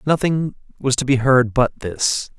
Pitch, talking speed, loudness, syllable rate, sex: 130 Hz, 175 wpm, -19 LUFS, 4.1 syllables/s, male